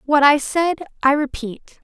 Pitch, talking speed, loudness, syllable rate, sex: 290 Hz, 165 wpm, -18 LUFS, 4.0 syllables/s, female